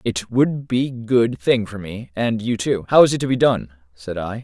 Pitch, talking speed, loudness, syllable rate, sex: 115 Hz, 245 wpm, -19 LUFS, 4.5 syllables/s, male